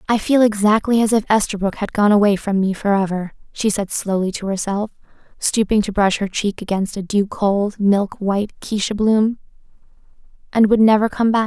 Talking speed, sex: 200 wpm, female